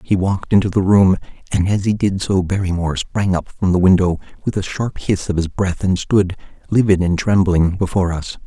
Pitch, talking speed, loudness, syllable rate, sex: 95 Hz, 215 wpm, -17 LUFS, 5.5 syllables/s, male